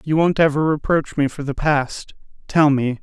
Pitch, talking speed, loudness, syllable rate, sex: 150 Hz, 200 wpm, -19 LUFS, 4.6 syllables/s, male